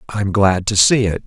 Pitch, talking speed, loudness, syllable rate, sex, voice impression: 105 Hz, 235 wpm, -15 LUFS, 4.6 syllables/s, male, masculine, adult-like, bright, soft, slightly raspy, slightly refreshing, sincere, friendly, reassuring, wild, kind